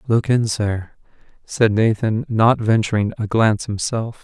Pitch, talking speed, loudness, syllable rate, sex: 110 Hz, 140 wpm, -18 LUFS, 4.3 syllables/s, male